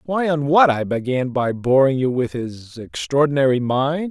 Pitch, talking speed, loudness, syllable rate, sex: 140 Hz, 160 wpm, -19 LUFS, 4.4 syllables/s, female